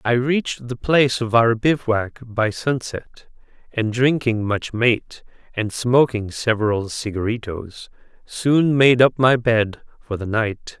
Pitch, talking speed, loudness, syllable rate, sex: 120 Hz, 140 wpm, -19 LUFS, 3.8 syllables/s, male